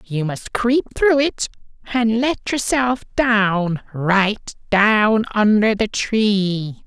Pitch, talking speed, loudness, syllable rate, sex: 215 Hz, 120 wpm, -18 LUFS, 2.8 syllables/s, male